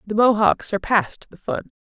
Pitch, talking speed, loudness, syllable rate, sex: 205 Hz, 165 wpm, -20 LUFS, 5.0 syllables/s, female